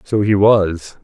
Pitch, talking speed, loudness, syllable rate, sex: 100 Hz, 175 wpm, -14 LUFS, 3.3 syllables/s, male